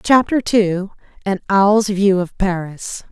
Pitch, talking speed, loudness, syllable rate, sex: 195 Hz, 115 wpm, -17 LUFS, 3.5 syllables/s, female